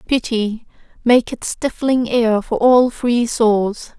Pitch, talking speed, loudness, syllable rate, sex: 235 Hz, 120 wpm, -17 LUFS, 3.2 syllables/s, female